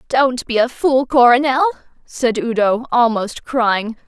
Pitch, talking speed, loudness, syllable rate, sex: 245 Hz, 130 wpm, -16 LUFS, 3.8 syllables/s, female